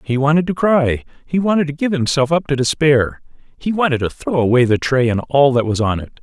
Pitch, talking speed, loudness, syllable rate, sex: 140 Hz, 240 wpm, -16 LUFS, 5.7 syllables/s, male